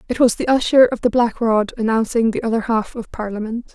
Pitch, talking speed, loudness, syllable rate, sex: 230 Hz, 225 wpm, -18 LUFS, 5.7 syllables/s, female